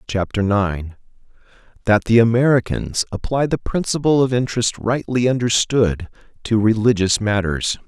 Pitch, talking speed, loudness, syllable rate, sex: 110 Hz, 115 wpm, -18 LUFS, 4.7 syllables/s, male